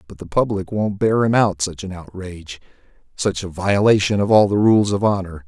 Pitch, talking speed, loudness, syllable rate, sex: 95 Hz, 195 wpm, -18 LUFS, 5.3 syllables/s, male